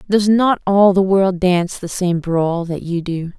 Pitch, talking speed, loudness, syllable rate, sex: 185 Hz, 215 wpm, -16 LUFS, 4.1 syllables/s, female